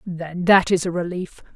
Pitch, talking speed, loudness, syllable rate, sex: 175 Hz, 195 wpm, -20 LUFS, 4.4 syllables/s, female